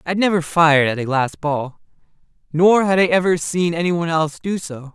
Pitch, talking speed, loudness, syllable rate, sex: 165 Hz, 205 wpm, -18 LUFS, 5.6 syllables/s, male